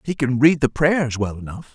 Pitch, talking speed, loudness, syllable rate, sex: 135 Hz, 240 wpm, -19 LUFS, 4.9 syllables/s, male